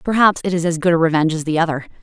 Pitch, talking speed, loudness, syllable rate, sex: 170 Hz, 295 wpm, -17 LUFS, 8.0 syllables/s, female